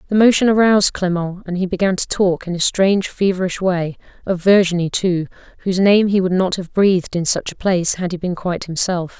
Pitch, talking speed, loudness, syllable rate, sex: 185 Hz, 210 wpm, -17 LUFS, 5.8 syllables/s, female